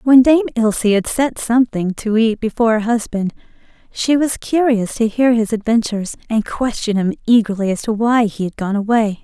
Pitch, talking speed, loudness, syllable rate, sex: 225 Hz, 190 wpm, -16 LUFS, 5.4 syllables/s, female